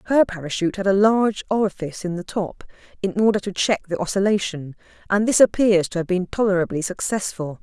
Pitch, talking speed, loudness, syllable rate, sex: 190 Hz, 180 wpm, -21 LUFS, 6.1 syllables/s, female